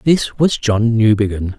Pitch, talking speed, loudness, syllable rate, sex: 115 Hz, 150 wpm, -15 LUFS, 4.1 syllables/s, male